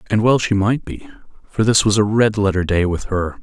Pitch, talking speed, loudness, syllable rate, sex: 105 Hz, 245 wpm, -17 LUFS, 5.4 syllables/s, male